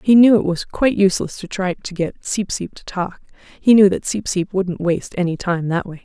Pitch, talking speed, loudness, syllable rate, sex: 190 Hz, 250 wpm, -18 LUFS, 5.4 syllables/s, female